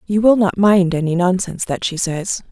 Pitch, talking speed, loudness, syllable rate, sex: 185 Hz, 215 wpm, -16 LUFS, 5.2 syllables/s, female